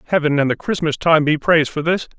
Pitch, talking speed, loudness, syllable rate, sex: 155 Hz, 245 wpm, -17 LUFS, 6.4 syllables/s, male